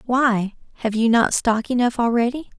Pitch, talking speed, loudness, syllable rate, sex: 235 Hz, 160 wpm, -20 LUFS, 4.7 syllables/s, female